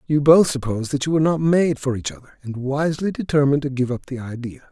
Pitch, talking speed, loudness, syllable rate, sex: 140 Hz, 240 wpm, -20 LUFS, 6.4 syllables/s, male